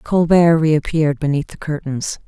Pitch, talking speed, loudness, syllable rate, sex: 155 Hz, 130 wpm, -17 LUFS, 4.6 syllables/s, female